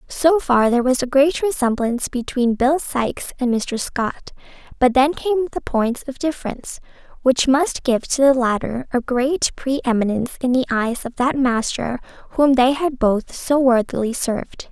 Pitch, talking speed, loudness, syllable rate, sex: 260 Hz, 175 wpm, -19 LUFS, 4.8 syllables/s, female